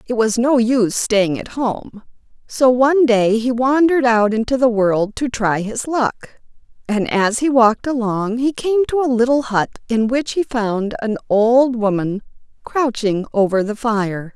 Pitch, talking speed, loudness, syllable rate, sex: 235 Hz, 175 wpm, -17 LUFS, 4.2 syllables/s, female